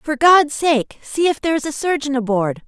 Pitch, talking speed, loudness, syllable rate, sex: 285 Hz, 225 wpm, -17 LUFS, 5.0 syllables/s, female